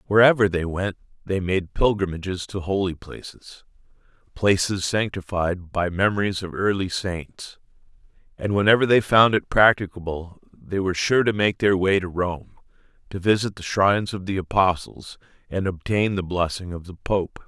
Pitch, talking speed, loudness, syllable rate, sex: 95 Hz, 150 wpm, -22 LUFS, 4.8 syllables/s, male